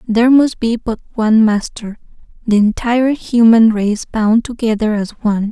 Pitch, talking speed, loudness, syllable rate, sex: 225 Hz, 140 wpm, -14 LUFS, 4.9 syllables/s, female